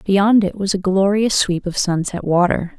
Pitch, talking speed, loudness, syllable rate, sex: 190 Hz, 195 wpm, -17 LUFS, 4.5 syllables/s, female